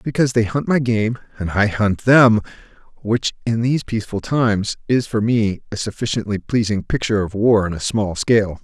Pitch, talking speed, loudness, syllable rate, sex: 110 Hz, 180 wpm, -18 LUFS, 5.4 syllables/s, male